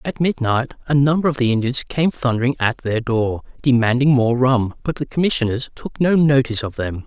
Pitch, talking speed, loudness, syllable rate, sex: 130 Hz, 195 wpm, -18 LUFS, 5.4 syllables/s, male